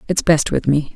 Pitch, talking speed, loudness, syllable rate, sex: 150 Hz, 250 wpm, -17 LUFS, 5.2 syllables/s, female